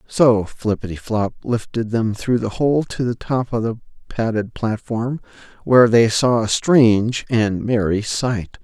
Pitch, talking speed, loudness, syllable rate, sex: 115 Hz, 155 wpm, -19 LUFS, 4.1 syllables/s, male